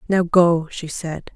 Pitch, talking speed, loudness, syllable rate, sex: 170 Hz, 175 wpm, -19 LUFS, 3.6 syllables/s, female